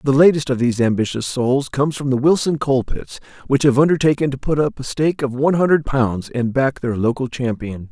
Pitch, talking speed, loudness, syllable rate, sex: 135 Hz, 220 wpm, -18 LUFS, 5.7 syllables/s, male